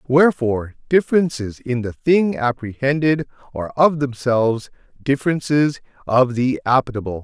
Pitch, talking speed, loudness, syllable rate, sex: 130 Hz, 110 wpm, -19 LUFS, 5.0 syllables/s, male